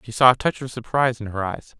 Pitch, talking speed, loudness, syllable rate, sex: 120 Hz, 300 wpm, -21 LUFS, 6.6 syllables/s, male